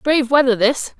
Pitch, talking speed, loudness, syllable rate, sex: 260 Hz, 180 wpm, -16 LUFS, 5.3 syllables/s, female